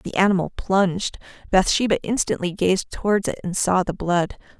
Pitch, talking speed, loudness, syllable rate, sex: 190 Hz, 155 wpm, -21 LUFS, 5.1 syllables/s, female